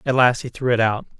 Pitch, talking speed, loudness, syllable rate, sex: 120 Hz, 300 wpm, -19 LUFS, 6.3 syllables/s, male